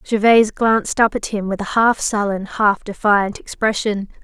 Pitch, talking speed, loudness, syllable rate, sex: 210 Hz, 170 wpm, -17 LUFS, 4.9 syllables/s, female